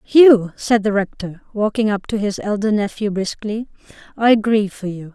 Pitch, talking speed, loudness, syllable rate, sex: 210 Hz, 175 wpm, -18 LUFS, 4.8 syllables/s, female